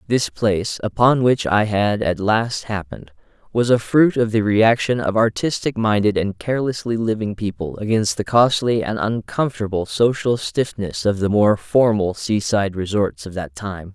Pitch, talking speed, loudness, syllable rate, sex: 105 Hz, 165 wpm, -19 LUFS, 4.7 syllables/s, male